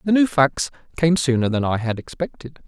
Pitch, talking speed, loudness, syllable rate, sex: 140 Hz, 200 wpm, -21 LUFS, 5.4 syllables/s, male